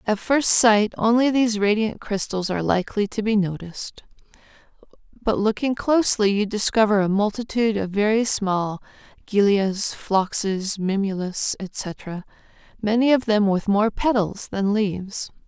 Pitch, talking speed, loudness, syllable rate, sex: 210 Hz, 130 wpm, -21 LUFS, 4.6 syllables/s, female